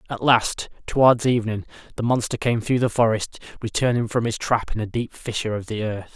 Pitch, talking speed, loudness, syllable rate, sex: 115 Hz, 205 wpm, -22 LUFS, 5.8 syllables/s, male